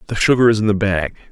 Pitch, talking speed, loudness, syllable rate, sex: 105 Hz, 275 wpm, -16 LUFS, 7.2 syllables/s, male